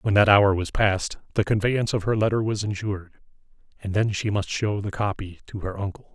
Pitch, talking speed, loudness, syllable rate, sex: 100 Hz, 215 wpm, -24 LUFS, 5.7 syllables/s, male